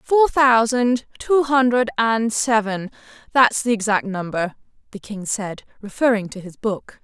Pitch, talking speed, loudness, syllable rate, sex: 225 Hz, 145 wpm, -19 LUFS, 4.1 syllables/s, female